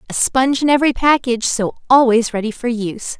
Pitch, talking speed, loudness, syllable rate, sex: 245 Hz, 190 wpm, -16 LUFS, 6.3 syllables/s, female